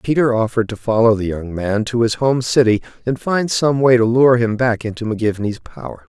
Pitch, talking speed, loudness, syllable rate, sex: 115 Hz, 215 wpm, -17 LUFS, 5.6 syllables/s, male